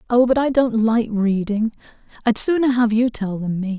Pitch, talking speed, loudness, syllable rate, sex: 225 Hz, 205 wpm, -19 LUFS, 4.9 syllables/s, female